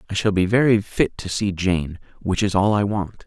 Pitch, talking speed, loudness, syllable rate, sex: 100 Hz, 220 wpm, -21 LUFS, 4.9 syllables/s, male